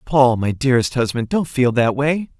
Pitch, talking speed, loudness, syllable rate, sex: 130 Hz, 200 wpm, -18 LUFS, 4.1 syllables/s, male